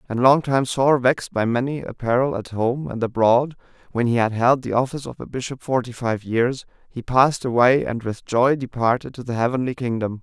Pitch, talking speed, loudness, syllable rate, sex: 125 Hz, 210 wpm, -21 LUFS, 5.4 syllables/s, male